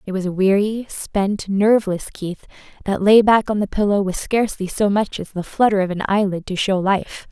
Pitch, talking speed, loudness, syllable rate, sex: 200 Hz, 215 wpm, -19 LUFS, 5.1 syllables/s, female